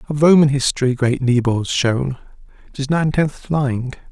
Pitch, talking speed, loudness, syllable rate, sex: 135 Hz, 145 wpm, -17 LUFS, 4.7 syllables/s, male